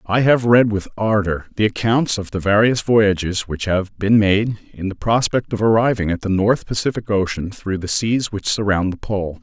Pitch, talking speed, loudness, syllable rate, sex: 105 Hz, 205 wpm, -18 LUFS, 4.8 syllables/s, male